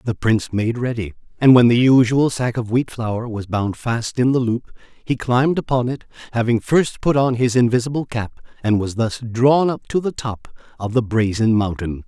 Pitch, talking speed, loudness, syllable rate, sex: 120 Hz, 205 wpm, -19 LUFS, 5.0 syllables/s, male